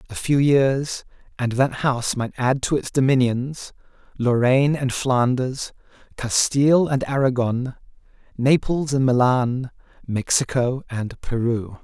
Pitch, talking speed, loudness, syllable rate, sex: 130 Hz, 115 wpm, -21 LUFS, 4.0 syllables/s, male